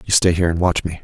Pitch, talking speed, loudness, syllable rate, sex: 85 Hz, 350 wpm, -17 LUFS, 7.7 syllables/s, male